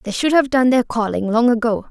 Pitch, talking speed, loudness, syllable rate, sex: 240 Hz, 250 wpm, -17 LUFS, 5.6 syllables/s, female